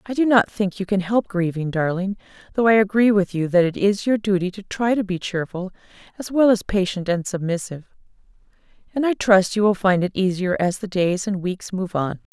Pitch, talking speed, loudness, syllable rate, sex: 195 Hz, 220 wpm, -21 LUFS, 5.4 syllables/s, female